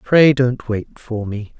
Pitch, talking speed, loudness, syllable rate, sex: 120 Hz, 190 wpm, -18 LUFS, 3.4 syllables/s, male